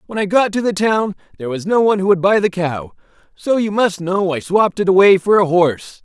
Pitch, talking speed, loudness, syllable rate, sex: 190 Hz, 260 wpm, -15 LUFS, 5.9 syllables/s, male